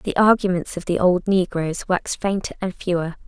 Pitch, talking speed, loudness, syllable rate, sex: 180 Hz, 185 wpm, -21 LUFS, 5.2 syllables/s, female